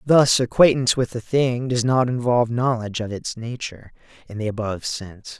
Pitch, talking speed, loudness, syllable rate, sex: 120 Hz, 180 wpm, -21 LUFS, 5.7 syllables/s, male